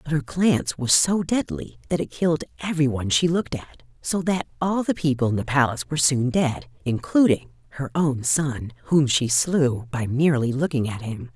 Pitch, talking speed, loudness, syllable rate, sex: 140 Hz, 195 wpm, -22 LUFS, 5.3 syllables/s, female